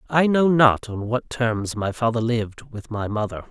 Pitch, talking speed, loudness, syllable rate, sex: 120 Hz, 205 wpm, -22 LUFS, 4.6 syllables/s, male